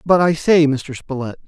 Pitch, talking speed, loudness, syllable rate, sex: 150 Hz, 205 wpm, -17 LUFS, 5.0 syllables/s, male